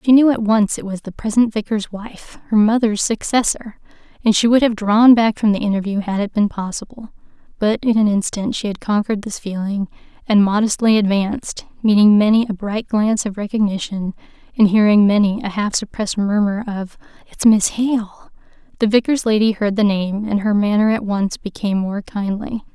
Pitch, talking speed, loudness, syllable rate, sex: 210 Hz, 185 wpm, -17 LUFS, 5.3 syllables/s, female